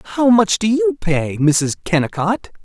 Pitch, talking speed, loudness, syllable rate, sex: 180 Hz, 160 wpm, -16 LUFS, 4.3 syllables/s, male